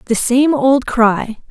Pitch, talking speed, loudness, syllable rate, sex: 250 Hz, 160 wpm, -14 LUFS, 3.2 syllables/s, female